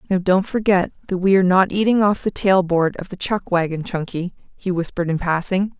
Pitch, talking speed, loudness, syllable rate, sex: 185 Hz, 215 wpm, -19 LUFS, 5.6 syllables/s, female